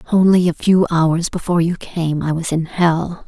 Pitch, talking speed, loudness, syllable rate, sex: 170 Hz, 200 wpm, -17 LUFS, 4.7 syllables/s, female